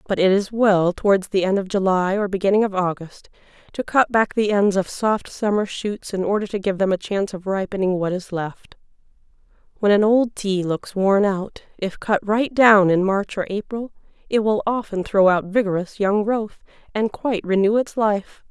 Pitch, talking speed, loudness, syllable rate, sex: 200 Hz, 200 wpm, -20 LUFS, 4.9 syllables/s, female